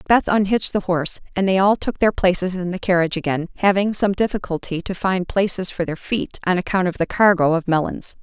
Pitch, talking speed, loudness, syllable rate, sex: 185 Hz, 220 wpm, -20 LUFS, 5.9 syllables/s, female